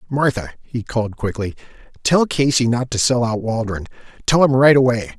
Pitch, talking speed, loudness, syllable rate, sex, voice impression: 120 Hz, 150 wpm, -18 LUFS, 5.4 syllables/s, male, masculine, adult-like, slightly thick, slightly hard, fluent, slightly raspy, intellectual, sincere, calm, slightly friendly, wild, lively, kind, modest